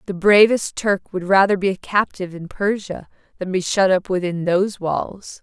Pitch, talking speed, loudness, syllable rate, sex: 190 Hz, 190 wpm, -19 LUFS, 4.8 syllables/s, female